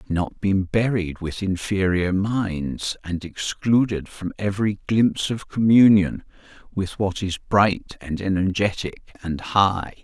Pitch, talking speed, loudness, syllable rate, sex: 95 Hz, 135 wpm, -22 LUFS, 4.0 syllables/s, male